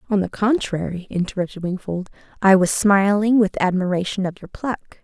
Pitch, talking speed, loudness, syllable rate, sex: 195 Hz, 155 wpm, -20 LUFS, 5.4 syllables/s, female